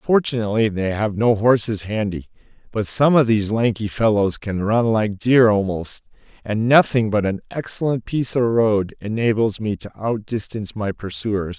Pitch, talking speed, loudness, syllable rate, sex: 110 Hz, 160 wpm, -20 LUFS, 4.8 syllables/s, male